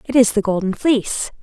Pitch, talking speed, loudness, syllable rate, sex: 220 Hz, 210 wpm, -18 LUFS, 5.7 syllables/s, female